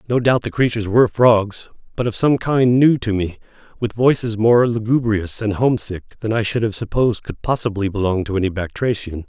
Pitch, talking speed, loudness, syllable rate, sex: 110 Hz, 195 wpm, -18 LUFS, 5.6 syllables/s, male